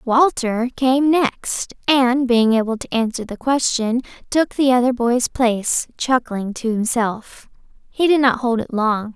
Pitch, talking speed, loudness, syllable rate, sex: 245 Hz, 155 wpm, -18 LUFS, 4.0 syllables/s, female